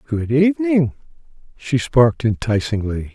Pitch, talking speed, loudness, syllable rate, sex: 130 Hz, 95 wpm, -18 LUFS, 4.5 syllables/s, male